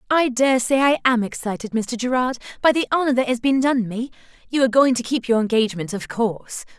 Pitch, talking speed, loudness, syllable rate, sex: 245 Hz, 220 wpm, -20 LUFS, 5.9 syllables/s, female